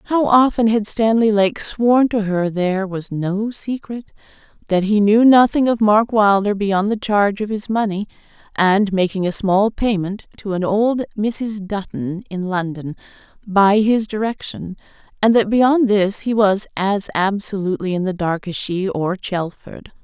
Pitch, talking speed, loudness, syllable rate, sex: 205 Hz, 165 wpm, -18 LUFS, 4.3 syllables/s, female